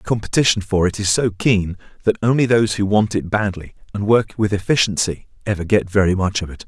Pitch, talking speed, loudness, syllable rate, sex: 105 Hz, 205 wpm, -18 LUFS, 5.8 syllables/s, male